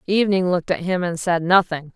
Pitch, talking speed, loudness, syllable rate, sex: 180 Hz, 215 wpm, -20 LUFS, 6.1 syllables/s, female